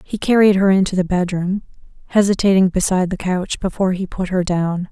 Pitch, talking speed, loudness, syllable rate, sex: 185 Hz, 185 wpm, -17 LUFS, 5.8 syllables/s, female